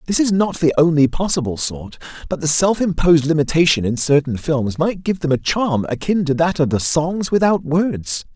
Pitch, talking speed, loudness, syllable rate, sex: 160 Hz, 200 wpm, -17 LUFS, 5.1 syllables/s, male